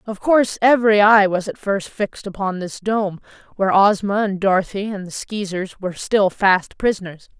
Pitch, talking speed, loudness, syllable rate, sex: 200 Hz, 180 wpm, -18 LUFS, 5.2 syllables/s, female